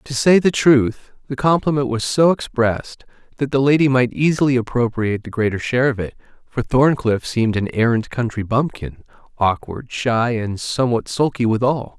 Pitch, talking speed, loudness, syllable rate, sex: 125 Hz, 165 wpm, -18 LUFS, 5.1 syllables/s, male